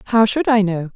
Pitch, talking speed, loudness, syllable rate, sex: 215 Hz, 250 wpm, -17 LUFS, 5.8 syllables/s, female